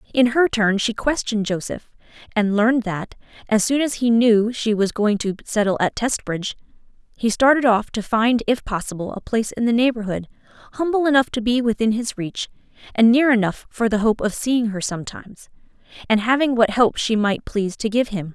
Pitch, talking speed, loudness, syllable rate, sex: 225 Hz, 195 wpm, -20 LUFS, 5.4 syllables/s, female